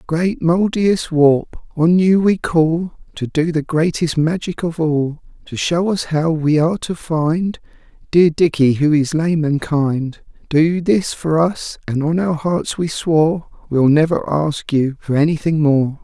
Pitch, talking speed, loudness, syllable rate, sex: 160 Hz, 170 wpm, -17 LUFS, 3.9 syllables/s, male